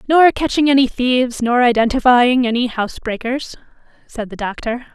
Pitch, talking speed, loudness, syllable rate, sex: 245 Hz, 145 wpm, -16 LUFS, 5.3 syllables/s, female